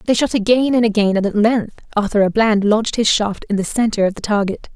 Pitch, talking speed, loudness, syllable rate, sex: 215 Hz, 255 wpm, -17 LUFS, 6.1 syllables/s, female